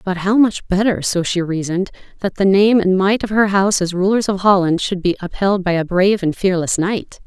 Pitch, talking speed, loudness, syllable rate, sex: 190 Hz, 230 wpm, -16 LUFS, 5.5 syllables/s, female